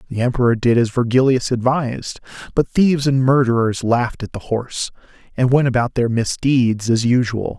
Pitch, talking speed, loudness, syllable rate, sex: 125 Hz, 165 wpm, -17 LUFS, 5.3 syllables/s, male